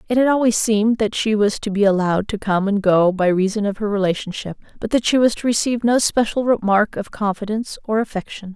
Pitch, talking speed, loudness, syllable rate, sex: 210 Hz, 225 wpm, -19 LUFS, 6.0 syllables/s, female